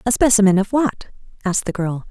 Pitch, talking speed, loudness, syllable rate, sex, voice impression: 210 Hz, 200 wpm, -18 LUFS, 6.1 syllables/s, female, very feminine, middle-aged, thin, tensed, slightly powerful, bright, slightly soft, clear, fluent, cool, intellectual, refreshing, sincere, slightly calm, slightly friendly, reassuring, unique, slightly elegant, slightly wild, sweet, lively, strict, slightly intense, sharp, slightly light